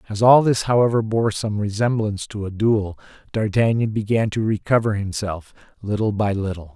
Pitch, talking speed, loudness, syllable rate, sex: 105 Hz, 160 wpm, -20 LUFS, 5.2 syllables/s, male